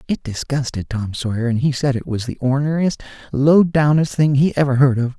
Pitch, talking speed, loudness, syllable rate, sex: 135 Hz, 210 wpm, -18 LUFS, 5.4 syllables/s, male